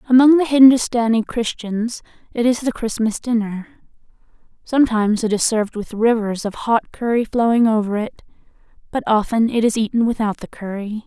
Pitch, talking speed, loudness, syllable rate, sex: 225 Hz, 155 wpm, -18 LUFS, 5.3 syllables/s, female